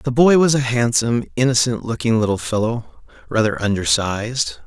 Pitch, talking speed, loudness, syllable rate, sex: 115 Hz, 140 wpm, -18 LUFS, 5.2 syllables/s, male